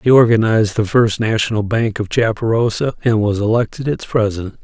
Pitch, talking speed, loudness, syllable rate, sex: 110 Hz, 170 wpm, -16 LUFS, 5.5 syllables/s, male